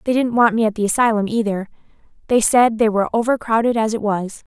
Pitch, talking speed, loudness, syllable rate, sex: 220 Hz, 225 wpm, -17 LUFS, 6.2 syllables/s, female